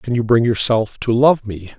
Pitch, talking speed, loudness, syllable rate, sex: 115 Hz, 235 wpm, -16 LUFS, 4.7 syllables/s, male